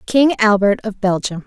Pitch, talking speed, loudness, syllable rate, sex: 210 Hz, 165 wpm, -16 LUFS, 4.6 syllables/s, female